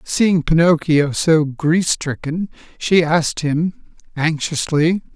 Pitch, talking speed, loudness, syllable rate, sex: 160 Hz, 105 wpm, -17 LUFS, 3.3 syllables/s, male